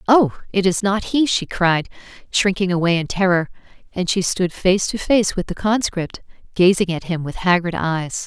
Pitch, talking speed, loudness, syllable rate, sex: 185 Hz, 190 wpm, -19 LUFS, 4.7 syllables/s, female